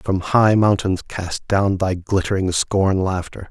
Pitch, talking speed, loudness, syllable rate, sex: 95 Hz, 155 wpm, -19 LUFS, 3.8 syllables/s, male